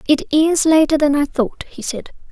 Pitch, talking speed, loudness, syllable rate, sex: 305 Hz, 205 wpm, -16 LUFS, 4.7 syllables/s, female